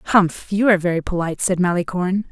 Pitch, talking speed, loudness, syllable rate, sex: 185 Hz, 180 wpm, -19 LUFS, 7.0 syllables/s, female